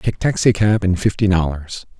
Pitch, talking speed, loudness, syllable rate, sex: 95 Hz, 150 wpm, -17 LUFS, 4.9 syllables/s, male